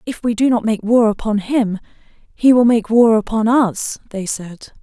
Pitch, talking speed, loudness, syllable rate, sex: 225 Hz, 200 wpm, -16 LUFS, 4.4 syllables/s, female